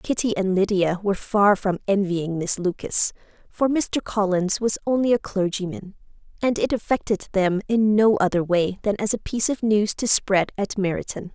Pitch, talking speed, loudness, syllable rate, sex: 200 Hz, 180 wpm, -22 LUFS, 4.9 syllables/s, female